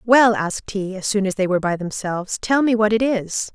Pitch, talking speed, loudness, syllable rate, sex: 205 Hz, 255 wpm, -20 LUFS, 5.6 syllables/s, female